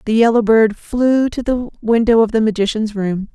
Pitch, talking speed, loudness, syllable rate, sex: 225 Hz, 195 wpm, -15 LUFS, 4.7 syllables/s, female